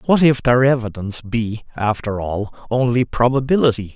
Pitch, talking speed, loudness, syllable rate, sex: 120 Hz, 135 wpm, -18 LUFS, 5.1 syllables/s, male